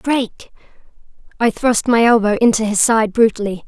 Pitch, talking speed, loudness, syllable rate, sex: 225 Hz, 145 wpm, -15 LUFS, 5.2 syllables/s, female